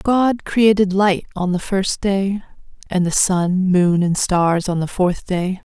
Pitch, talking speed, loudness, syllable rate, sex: 190 Hz, 180 wpm, -18 LUFS, 3.6 syllables/s, female